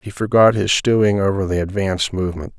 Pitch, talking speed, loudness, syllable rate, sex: 100 Hz, 185 wpm, -17 LUFS, 6.1 syllables/s, male